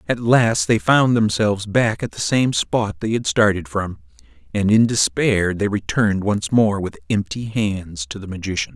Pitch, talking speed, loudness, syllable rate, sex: 100 Hz, 185 wpm, -19 LUFS, 4.6 syllables/s, male